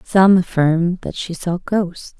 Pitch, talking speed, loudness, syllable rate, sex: 180 Hz, 165 wpm, -18 LUFS, 3.4 syllables/s, female